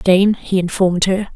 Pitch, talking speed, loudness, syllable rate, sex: 190 Hz, 180 wpm, -16 LUFS, 4.6 syllables/s, female